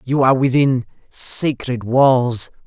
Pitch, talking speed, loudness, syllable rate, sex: 125 Hz, 110 wpm, -17 LUFS, 3.6 syllables/s, male